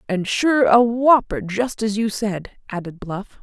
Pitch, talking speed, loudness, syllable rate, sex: 220 Hz, 175 wpm, -19 LUFS, 4.0 syllables/s, female